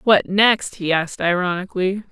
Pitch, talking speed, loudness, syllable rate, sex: 190 Hz, 140 wpm, -19 LUFS, 5.1 syllables/s, female